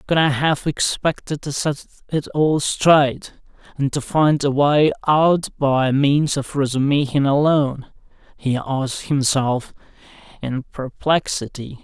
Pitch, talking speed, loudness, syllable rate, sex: 140 Hz, 125 wpm, -19 LUFS, 3.8 syllables/s, male